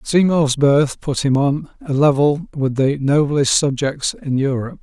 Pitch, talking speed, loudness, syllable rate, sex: 140 Hz, 160 wpm, -17 LUFS, 4.3 syllables/s, male